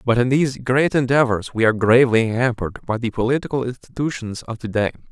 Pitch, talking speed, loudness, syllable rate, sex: 120 Hz, 175 wpm, -19 LUFS, 6.2 syllables/s, male